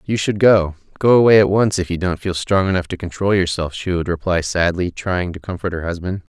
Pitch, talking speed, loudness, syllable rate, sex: 90 Hz, 235 wpm, -18 LUFS, 5.6 syllables/s, male